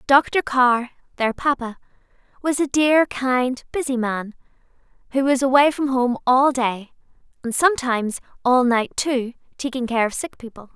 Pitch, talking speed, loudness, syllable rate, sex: 255 Hz, 150 wpm, -20 LUFS, 4.5 syllables/s, female